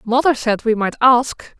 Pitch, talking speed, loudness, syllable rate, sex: 240 Hz, 190 wpm, -16 LUFS, 4.2 syllables/s, female